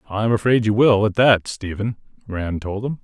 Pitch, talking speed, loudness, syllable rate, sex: 110 Hz, 200 wpm, -19 LUFS, 4.8 syllables/s, male